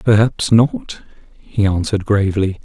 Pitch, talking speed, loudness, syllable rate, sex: 100 Hz, 115 wpm, -16 LUFS, 4.6 syllables/s, male